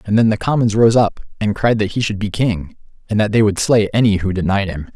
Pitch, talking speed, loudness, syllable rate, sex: 105 Hz, 265 wpm, -16 LUFS, 5.7 syllables/s, male